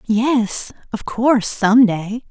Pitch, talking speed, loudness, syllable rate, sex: 225 Hz, 105 wpm, -17 LUFS, 3.6 syllables/s, female